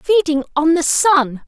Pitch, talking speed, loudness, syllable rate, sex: 320 Hz, 165 wpm, -15 LUFS, 3.8 syllables/s, female